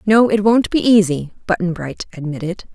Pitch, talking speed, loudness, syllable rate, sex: 190 Hz, 175 wpm, -17 LUFS, 5.1 syllables/s, female